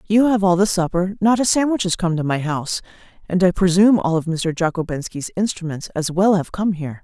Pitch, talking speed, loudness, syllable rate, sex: 180 Hz, 205 wpm, -19 LUFS, 5.9 syllables/s, female